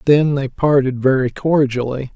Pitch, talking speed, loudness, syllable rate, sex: 135 Hz, 140 wpm, -17 LUFS, 4.5 syllables/s, male